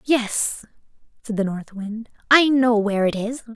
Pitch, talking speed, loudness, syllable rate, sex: 225 Hz, 170 wpm, -20 LUFS, 4.2 syllables/s, female